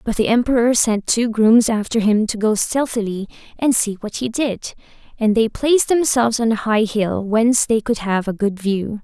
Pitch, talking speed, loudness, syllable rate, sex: 225 Hz, 205 wpm, -18 LUFS, 5.0 syllables/s, female